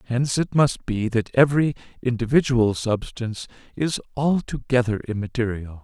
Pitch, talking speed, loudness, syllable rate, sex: 120 Hz, 115 wpm, -22 LUFS, 5.1 syllables/s, male